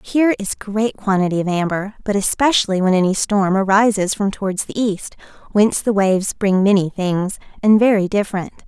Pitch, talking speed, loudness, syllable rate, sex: 200 Hz, 175 wpm, -17 LUFS, 5.4 syllables/s, female